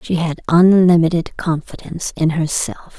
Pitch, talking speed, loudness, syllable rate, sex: 165 Hz, 120 wpm, -16 LUFS, 5.0 syllables/s, female